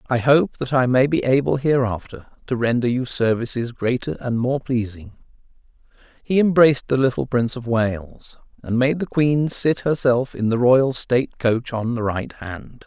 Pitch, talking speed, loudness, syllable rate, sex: 125 Hz, 175 wpm, -20 LUFS, 4.7 syllables/s, male